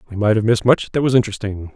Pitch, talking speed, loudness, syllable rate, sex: 110 Hz, 275 wpm, -17 LUFS, 7.7 syllables/s, male